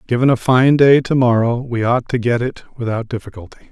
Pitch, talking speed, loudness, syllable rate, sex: 120 Hz, 210 wpm, -16 LUFS, 5.9 syllables/s, male